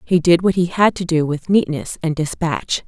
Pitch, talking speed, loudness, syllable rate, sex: 170 Hz, 230 wpm, -18 LUFS, 4.8 syllables/s, female